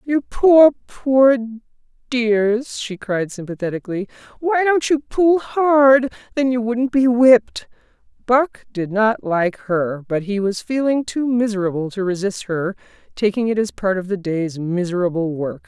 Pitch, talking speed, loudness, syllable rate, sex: 220 Hz, 150 wpm, -18 LUFS, 4.2 syllables/s, female